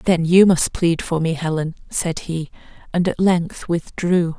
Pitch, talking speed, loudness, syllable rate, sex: 170 Hz, 180 wpm, -19 LUFS, 4.0 syllables/s, female